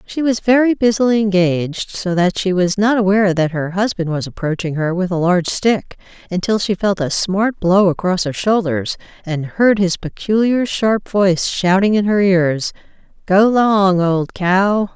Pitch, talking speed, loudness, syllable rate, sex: 190 Hz, 175 wpm, -16 LUFS, 4.5 syllables/s, female